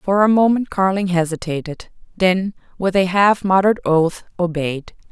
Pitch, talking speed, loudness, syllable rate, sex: 185 Hz, 140 wpm, -17 LUFS, 4.7 syllables/s, female